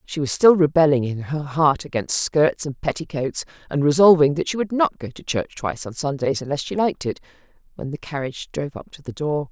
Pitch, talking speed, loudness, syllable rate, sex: 150 Hz, 220 wpm, -21 LUFS, 5.7 syllables/s, female